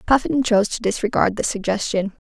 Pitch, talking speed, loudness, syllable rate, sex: 215 Hz, 160 wpm, -20 LUFS, 5.9 syllables/s, female